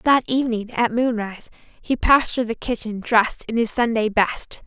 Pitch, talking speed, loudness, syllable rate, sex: 230 Hz, 180 wpm, -21 LUFS, 5.0 syllables/s, female